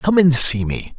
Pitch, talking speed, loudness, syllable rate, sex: 145 Hz, 245 wpm, -15 LUFS, 4.3 syllables/s, male